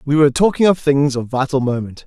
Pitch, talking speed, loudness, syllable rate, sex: 140 Hz, 230 wpm, -16 LUFS, 6.2 syllables/s, male